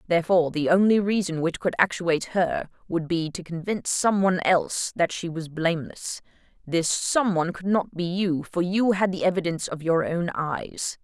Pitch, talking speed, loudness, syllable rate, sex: 175 Hz, 180 wpm, -24 LUFS, 5.2 syllables/s, female